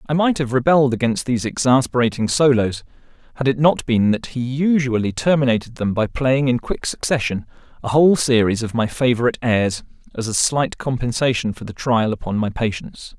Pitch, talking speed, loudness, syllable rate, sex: 125 Hz, 175 wpm, -19 LUFS, 5.6 syllables/s, male